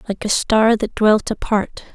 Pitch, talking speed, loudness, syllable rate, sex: 215 Hz, 185 wpm, -17 LUFS, 4.2 syllables/s, female